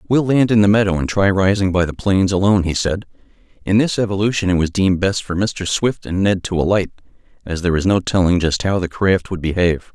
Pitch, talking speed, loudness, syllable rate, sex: 95 Hz, 235 wpm, -17 LUFS, 6.1 syllables/s, male